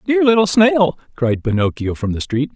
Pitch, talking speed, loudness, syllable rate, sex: 165 Hz, 190 wpm, -16 LUFS, 4.9 syllables/s, male